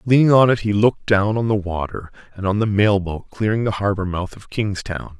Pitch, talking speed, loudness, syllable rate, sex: 100 Hz, 210 wpm, -19 LUFS, 5.4 syllables/s, male